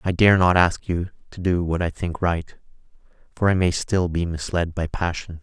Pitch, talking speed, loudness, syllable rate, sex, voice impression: 85 Hz, 210 wpm, -22 LUFS, 4.8 syllables/s, male, masculine, very adult-like, cool, sincere, slightly friendly